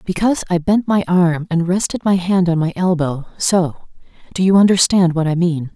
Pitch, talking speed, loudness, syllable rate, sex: 180 Hz, 190 wpm, -16 LUFS, 5.1 syllables/s, female